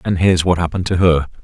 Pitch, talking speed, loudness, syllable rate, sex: 85 Hz, 250 wpm, -16 LUFS, 7.4 syllables/s, male